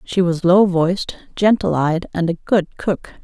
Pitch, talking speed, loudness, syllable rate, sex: 180 Hz, 185 wpm, -17 LUFS, 4.4 syllables/s, female